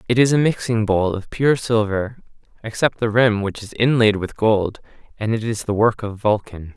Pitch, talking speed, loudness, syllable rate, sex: 110 Hz, 205 wpm, -19 LUFS, 4.9 syllables/s, male